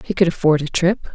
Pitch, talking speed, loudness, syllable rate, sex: 170 Hz, 260 wpm, -18 LUFS, 5.8 syllables/s, female